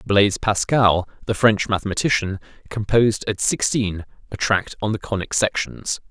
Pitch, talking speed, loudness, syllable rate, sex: 105 Hz, 140 wpm, -20 LUFS, 4.9 syllables/s, male